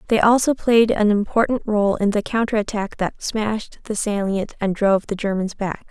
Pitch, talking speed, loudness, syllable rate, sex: 210 Hz, 195 wpm, -20 LUFS, 5.0 syllables/s, female